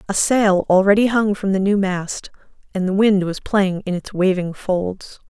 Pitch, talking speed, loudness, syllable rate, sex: 195 Hz, 190 wpm, -18 LUFS, 4.4 syllables/s, female